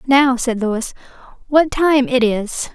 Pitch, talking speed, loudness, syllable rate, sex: 255 Hz, 155 wpm, -16 LUFS, 3.4 syllables/s, female